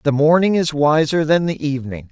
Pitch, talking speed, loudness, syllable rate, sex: 150 Hz, 200 wpm, -17 LUFS, 5.5 syllables/s, male